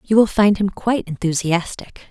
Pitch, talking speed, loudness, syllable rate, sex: 195 Hz, 170 wpm, -18 LUFS, 5.2 syllables/s, female